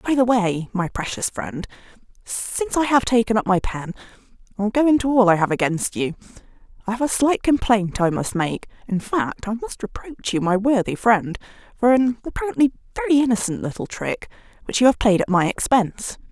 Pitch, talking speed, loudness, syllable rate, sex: 225 Hz, 185 wpm, -21 LUFS, 5.4 syllables/s, female